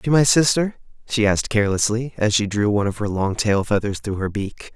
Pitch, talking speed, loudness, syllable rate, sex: 110 Hz, 225 wpm, -20 LUFS, 5.7 syllables/s, male